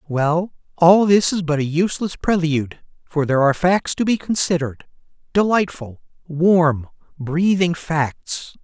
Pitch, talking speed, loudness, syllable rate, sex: 165 Hz, 125 wpm, -18 LUFS, 4.4 syllables/s, male